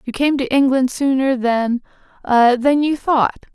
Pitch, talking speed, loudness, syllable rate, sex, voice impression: 260 Hz, 135 wpm, -17 LUFS, 4.2 syllables/s, female, feminine, adult-like, powerful, bright, soft, slightly muffled, intellectual, calm, friendly, reassuring, kind